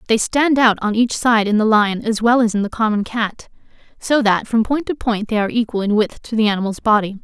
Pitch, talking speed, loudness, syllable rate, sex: 220 Hz, 255 wpm, -17 LUFS, 5.7 syllables/s, female